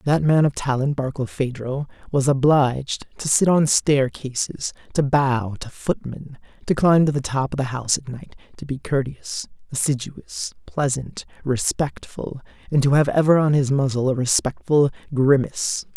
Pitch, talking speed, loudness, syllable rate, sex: 140 Hz, 160 wpm, -21 LUFS, 4.7 syllables/s, male